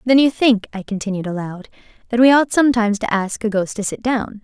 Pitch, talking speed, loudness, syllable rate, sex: 220 Hz, 230 wpm, -18 LUFS, 6.0 syllables/s, female